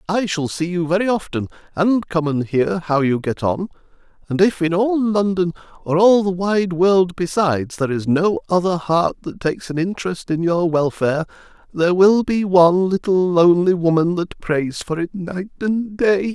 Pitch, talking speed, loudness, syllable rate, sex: 175 Hz, 185 wpm, -18 LUFS, 4.8 syllables/s, male